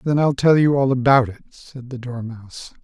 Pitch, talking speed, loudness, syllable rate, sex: 130 Hz, 235 wpm, -18 LUFS, 5.7 syllables/s, male